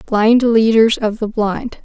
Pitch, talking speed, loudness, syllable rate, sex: 220 Hz, 165 wpm, -14 LUFS, 3.6 syllables/s, female